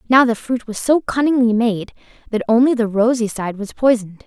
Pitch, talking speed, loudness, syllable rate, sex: 235 Hz, 195 wpm, -17 LUFS, 5.5 syllables/s, female